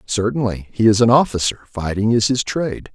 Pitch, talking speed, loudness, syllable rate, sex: 115 Hz, 165 wpm, -18 LUFS, 5.5 syllables/s, male